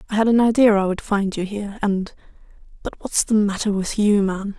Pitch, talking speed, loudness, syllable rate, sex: 205 Hz, 210 wpm, -20 LUFS, 5.4 syllables/s, female